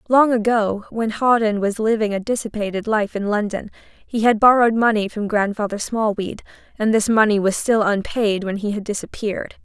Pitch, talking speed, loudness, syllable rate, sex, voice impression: 215 Hz, 175 wpm, -19 LUFS, 5.3 syllables/s, female, feminine, slightly adult-like, slightly cute, refreshing, friendly